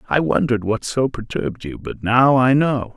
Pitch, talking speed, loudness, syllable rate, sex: 120 Hz, 205 wpm, -18 LUFS, 5.1 syllables/s, male